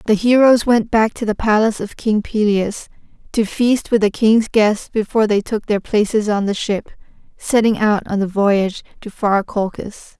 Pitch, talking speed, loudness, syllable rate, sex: 215 Hz, 190 wpm, -17 LUFS, 4.7 syllables/s, female